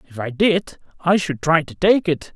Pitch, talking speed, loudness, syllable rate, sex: 165 Hz, 230 wpm, -19 LUFS, 4.6 syllables/s, male